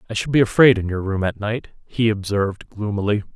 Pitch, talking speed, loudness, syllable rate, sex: 105 Hz, 215 wpm, -20 LUFS, 5.9 syllables/s, male